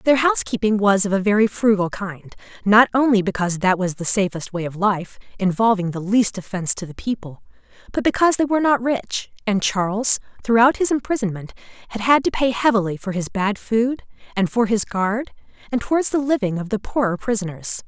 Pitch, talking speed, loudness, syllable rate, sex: 215 Hz, 190 wpm, -20 LUFS, 5.8 syllables/s, female